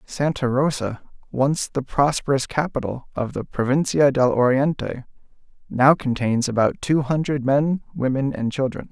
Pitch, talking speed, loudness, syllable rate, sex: 135 Hz, 135 wpm, -21 LUFS, 4.6 syllables/s, male